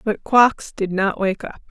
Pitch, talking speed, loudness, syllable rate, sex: 205 Hz, 210 wpm, -19 LUFS, 4.1 syllables/s, female